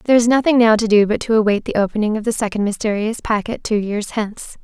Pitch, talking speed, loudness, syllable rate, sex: 220 Hz, 245 wpm, -17 LUFS, 6.5 syllables/s, female